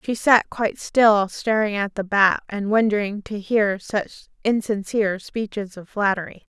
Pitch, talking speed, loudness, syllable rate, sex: 205 Hz, 155 wpm, -21 LUFS, 4.5 syllables/s, female